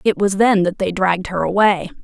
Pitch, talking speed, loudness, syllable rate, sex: 195 Hz, 235 wpm, -17 LUFS, 5.5 syllables/s, female